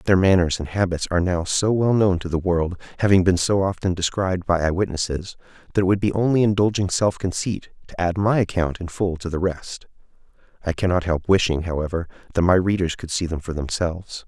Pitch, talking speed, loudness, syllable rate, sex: 90 Hz, 205 wpm, -21 LUFS, 5.7 syllables/s, male